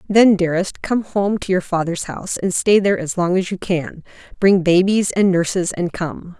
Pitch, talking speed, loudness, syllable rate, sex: 185 Hz, 205 wpm, -18 LUFS, 5.0 syllables/s, female